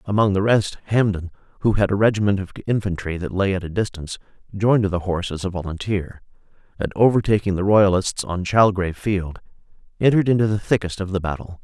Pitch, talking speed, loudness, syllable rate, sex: 100 Hz, 180 wpm, -20 LUFS, 6.2 syllables/s, male